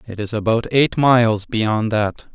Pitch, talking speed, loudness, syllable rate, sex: 115 Hz, 180 wpm, -18 LUFS, 4.2 syllables/s, male